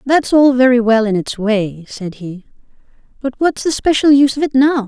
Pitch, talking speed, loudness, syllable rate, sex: 245 Hz, 210 wpm, -14 LUFS, 5.1 syllables/s, female